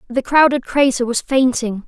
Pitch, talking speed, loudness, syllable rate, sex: 255 Hz, 160 wpm, -16 LUFS, 4.7 syllables/s, female